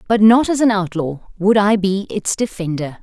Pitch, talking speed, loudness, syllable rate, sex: 200 Hz, 200 wpm, -16 LUFS, 4.9 syllables/s, female